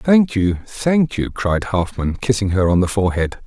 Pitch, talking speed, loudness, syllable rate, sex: 105 Hz, 190 wpm, -18 LUFS, 4.6 syllables/s, male